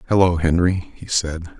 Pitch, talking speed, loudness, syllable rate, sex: 85 Hz, 150 wpm, -20 LUFS, 4.4 syllables/s, male